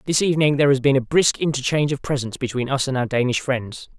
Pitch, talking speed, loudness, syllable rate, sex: 135 Hz, 240 wpm, -20 LUFS, 6.7 syllables/s, male